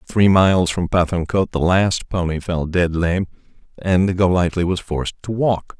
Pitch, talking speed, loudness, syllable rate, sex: 90 Hz, 165 wpm, -18 LUFS, 4.7 syllables/s, male